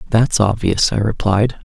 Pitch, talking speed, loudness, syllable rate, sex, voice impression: 105 Hz, 135 wpm, -16 LUFS, 4.1 syllables/s, male, masculine, adult-like, relaxed, slightly weak, slightly dark, raspy, calm, friendly, reassuring, slightly wild, kind, modest